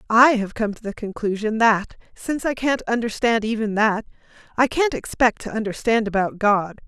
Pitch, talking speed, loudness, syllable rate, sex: 220 Hz, 175 wpm, -21 LUFS, 5.1 syllables/s, female